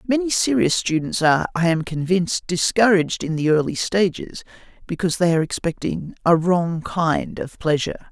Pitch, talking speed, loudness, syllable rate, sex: 170 Hz, 155 wpm, -20 LUFS, 5.3 syllables/s, male